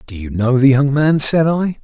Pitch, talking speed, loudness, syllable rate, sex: 135 Hz, 260 wpm, -14 LUFS, 4.7 syllables/s, male